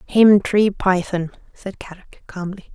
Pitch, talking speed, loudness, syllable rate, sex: 190 Hz, 130 wpm, -18 LUFS, 4.4 syllables/s, female